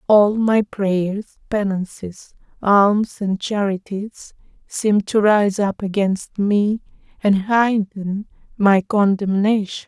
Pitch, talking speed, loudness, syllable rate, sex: 200 Hz, 105 wpm, -19 LUFS, 3.3 syllables/s, female